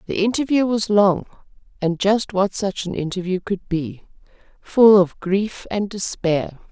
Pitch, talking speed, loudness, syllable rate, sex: 195 Hz, 150 wpm, -20 LUFS, 4.2 syllables/s, female